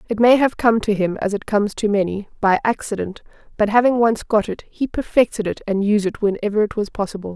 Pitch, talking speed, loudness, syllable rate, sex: 210 Hz, 230 wpm, -19 LUFS, 5.9 syllables/s, female